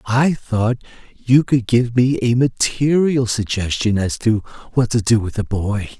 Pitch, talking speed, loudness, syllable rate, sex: 115 Hz, 170 wpm, -18 LUFS, 4.1 syllables/s, male